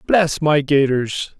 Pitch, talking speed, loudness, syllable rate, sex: 150 Hz, 130 wpm, -17 LUFS, 3.2 syllables/s, male